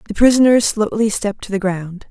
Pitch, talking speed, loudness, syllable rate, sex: 210 Hz, 200 wpm, -16 LUFS, 5.7 syllables/s, female